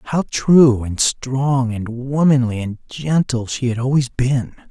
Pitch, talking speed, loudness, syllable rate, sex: 125 Hz, 155 wpm, -18 LUFS, 3.6 syllables/s, male